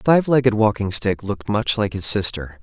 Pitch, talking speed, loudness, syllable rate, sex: 110 Hz, 230 wpm, -19 LUFS, 5.6 syllables/s, male